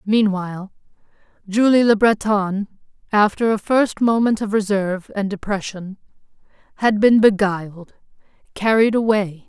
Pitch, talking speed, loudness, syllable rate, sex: 205 Hz, 110 wpm, -18 LUFS, 4.6 syllables/s, female